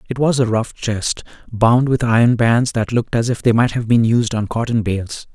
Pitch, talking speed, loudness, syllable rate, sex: 115 Hz, 235 wpm, -17 LUFS, 5.0 syllables/s, male